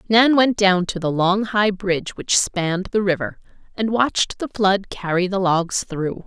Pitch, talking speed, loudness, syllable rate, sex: 195 Hz, 190 wpm, -19 LUFS, 4.4 syllables/s, female